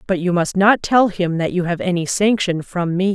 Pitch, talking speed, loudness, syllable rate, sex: 180 Hz, 250 wpm, -18 LUFS, 4.9 syllables/s, female